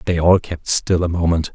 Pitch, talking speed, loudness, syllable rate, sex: 85 Hz, 235 wpm, -17 LUFS, 5.0 syllables/s, male